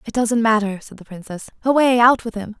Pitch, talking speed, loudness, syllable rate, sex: 220 Hz, 230 wpm, -17 LUFS, 5.7 syllables/s, female